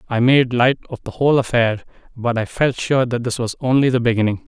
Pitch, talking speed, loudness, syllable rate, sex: 120 Hz, 225 wpm, -18 LUFS, 5.9 syllables/s, male